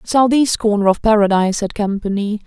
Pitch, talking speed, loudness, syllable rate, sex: 210 Hz, 145 wpm, -16 LUFS, 5.6 syllables/s, female